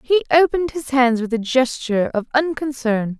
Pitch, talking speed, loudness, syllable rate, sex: 260 Hz, 170 wpm, -19 LUFS, 5.2 syllables/s, female